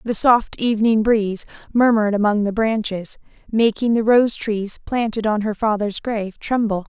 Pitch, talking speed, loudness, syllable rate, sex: 220 Hz, 155 wpm, -19 LUFS, 4.9 syllables/s, female